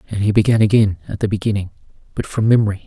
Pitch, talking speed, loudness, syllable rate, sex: 105 Hz, 210 wpm, -17 LUFS, 7.2 syllables/s, male